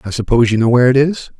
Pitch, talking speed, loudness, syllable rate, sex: 125 Hz, 300 wpm, -13 LUFS, 8.0 syllables/s, male